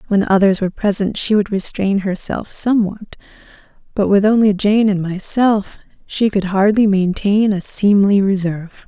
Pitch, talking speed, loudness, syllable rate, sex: 200 Hz, 150 wpm, -16 LUFS, 4.9 syllables/s, female